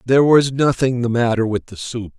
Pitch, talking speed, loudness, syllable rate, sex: 120 Hz, 220 wpm, -17 LUFS, 5.3 syllables/s, male